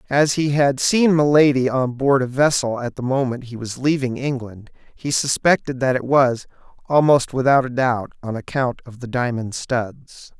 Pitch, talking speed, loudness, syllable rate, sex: 130 Hz, 180 wpm, -19 LUFS, 4.6 syllables/s, male